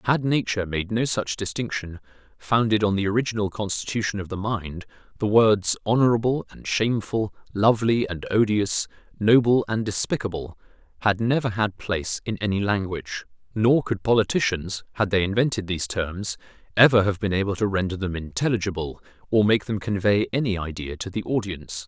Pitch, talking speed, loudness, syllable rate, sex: 100 Hz, 155 wpm, -23 LUFS, 5.5 syllables/s, male